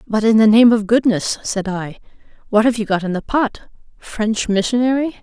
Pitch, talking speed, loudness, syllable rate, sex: 220 Hz, 195 wpm, -16 LUFS, 5.1 syllables/s, female